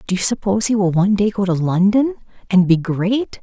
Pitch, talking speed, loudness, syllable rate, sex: 200 Hz, 225 wpm, -17 LUFS, 5.8 syllables/s, female